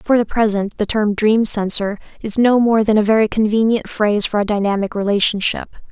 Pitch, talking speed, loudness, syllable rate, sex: 215 Hz, 195 wpm, -16 LUFS, 5.4 syllables/s, female